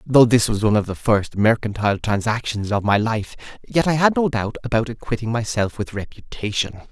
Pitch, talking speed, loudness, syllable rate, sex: 115 Hz, 190 wpm, -20 LUFS, 5.5 syllables/s, male